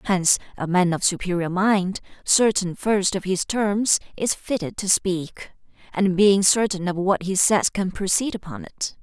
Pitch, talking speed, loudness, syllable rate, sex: 190 Hz, 175 wpm, -21 LUFS, 4.4 syllables/s, female